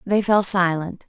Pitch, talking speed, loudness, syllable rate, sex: 185 Hz, 165 wpm, -18 LUFS, 4.1 syllables/s, female